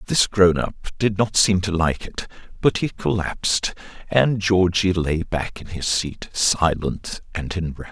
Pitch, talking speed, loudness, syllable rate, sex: 95 Hz, 165 wpm, -21 LUFS, 4.4 syllables/s, male